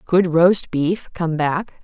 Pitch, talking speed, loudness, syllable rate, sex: 170 Hz, 165 wpm, -18 LUFS, 3.1 syllables/s, female